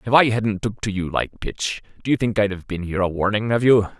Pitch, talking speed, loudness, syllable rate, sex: 105 Hz, 285 wpm, -21 LUFS, 5.8 syllables/s, male